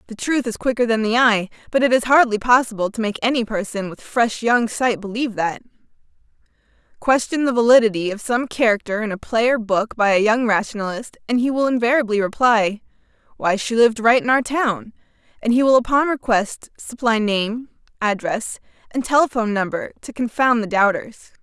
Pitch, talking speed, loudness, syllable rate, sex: 230 Hz, 180 wpm, -19 LUFS, 5.5 syllables/s, female